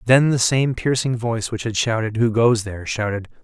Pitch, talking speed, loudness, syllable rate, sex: 115 Hz, 210 wpm, -20 LUFS, 5.4 syllables/s, male